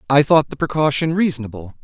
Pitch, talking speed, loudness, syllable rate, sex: 140 Hz, 165 wpm, -17 LUFS, 6.2 syllables/s, male